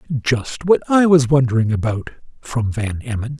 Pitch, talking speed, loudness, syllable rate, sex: 130 Hz, 160 wpm, -18 LUFS, 4.5 syllables/s, male